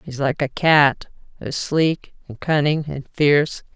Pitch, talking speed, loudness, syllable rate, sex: 150 Hz, 145 wpm, -19 LUFS, 4.0 syllables/s, female